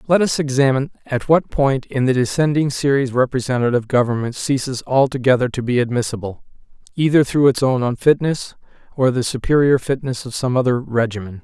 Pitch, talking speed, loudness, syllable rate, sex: 130 Hz, 155 wpm, -18 LUFS, 5.8 syllables/s, male